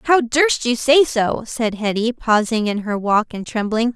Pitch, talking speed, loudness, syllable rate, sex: 235 Hz, 195 wpm, -18 LUFS, 4.2 syllables/s, female